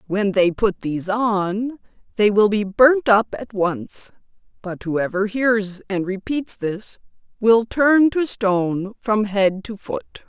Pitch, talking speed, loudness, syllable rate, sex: 210 Hz, 150 wpm, -20 LUFS, 3.5 syllables/s, female